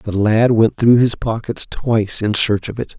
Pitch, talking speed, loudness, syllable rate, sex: 110 Hz, 220 wpm, -16 LUFS, 4.5 syllables/s, male